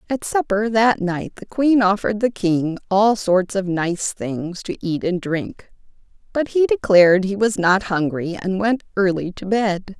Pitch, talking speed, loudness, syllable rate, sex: 200 Hz, 180 wpm, -19 LUFS, 4.1 syllables/s, female